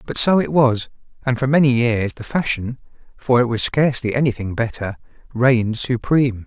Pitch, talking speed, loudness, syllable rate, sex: 125 Hz, 165 wpm, -18 LUFS, 5.3 syllables/s, male